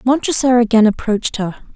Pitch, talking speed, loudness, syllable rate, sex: 235 Hz, 135 wpm, -15 LUFS, 5.8 syllables/s, female